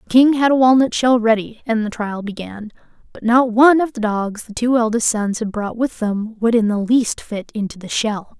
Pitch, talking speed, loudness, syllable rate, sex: 225 Hz, 235 wpm, -17 LUFS, 5.0 syllables/s, female